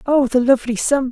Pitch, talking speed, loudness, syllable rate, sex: 260 Hz, 215 wpm, -16 LUFS, 6.1 syllables/s, female